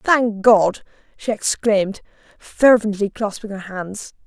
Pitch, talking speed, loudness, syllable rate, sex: 210 Hz, 115 wpm, -18 LUFS, 3.9 syllables/s, female